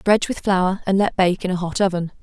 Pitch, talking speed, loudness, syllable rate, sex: 185 Hz, 270 wpm, -20 LUFS, 5.9 syllables/s, female